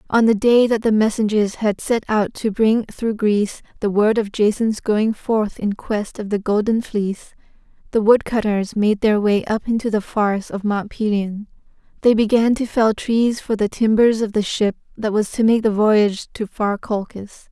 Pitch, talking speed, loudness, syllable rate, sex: 215 Hz, 195 wpm, -19 LUFS, 4.7 syllables/s, female